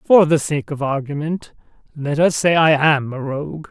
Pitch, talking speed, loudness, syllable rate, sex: 150 Hz, 195 wpm, -18 LUFS, 4.7 syllables/s, female